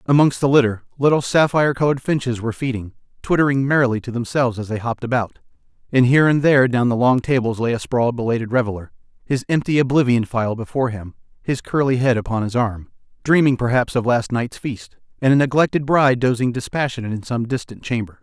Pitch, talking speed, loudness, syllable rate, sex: 125 Hz, 190 wpm, -19 LUFS, 6.4 syllables/s, male